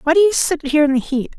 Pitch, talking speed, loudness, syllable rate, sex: 305 Hz, 345 wpm, -16 LUFS, 7.0 syllables/s, female